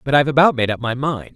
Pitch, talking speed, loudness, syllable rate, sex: 135 Hz, 310 wpm, -17 LUFS, 7.2 syllables/s, male